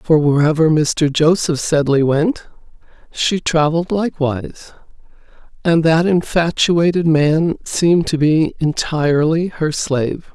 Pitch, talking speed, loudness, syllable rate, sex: 160 Hz, 110 wpm, -16 LUFS, 4.2 syllables/s, female